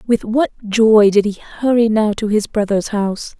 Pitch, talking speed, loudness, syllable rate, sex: 215 Hz, 195 wpm, -15 LUFS, 4.6 syllables/s, female